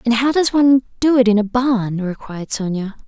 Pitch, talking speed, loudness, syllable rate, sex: 230 Hz, 215 wpm, -17 LUFS, 5.5 syllables/s, female